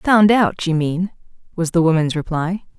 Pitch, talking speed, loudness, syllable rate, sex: 175 Hz, 170 wpm, -18 LUFS, 4.6 syllables/s, female